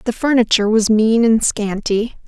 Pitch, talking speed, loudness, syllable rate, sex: 220 Hz, 160 wpm, -15 LUFS, 4.8 syllables/s, female